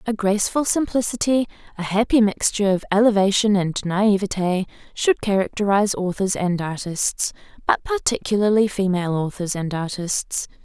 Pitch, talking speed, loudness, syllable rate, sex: 200 Hz, 120 wpm, -21 LUFS, 5.1 syllables/s, female